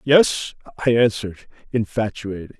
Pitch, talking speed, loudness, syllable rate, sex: 115 Hz, 90 wpm, -21 LUFS, 5.1 syllables/s, male